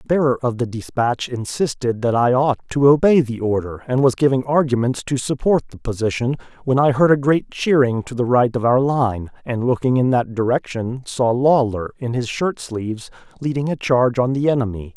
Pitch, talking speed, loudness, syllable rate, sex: 125 Hz, 200 wpm, -19 LUFS, 5.2 syllables/s, male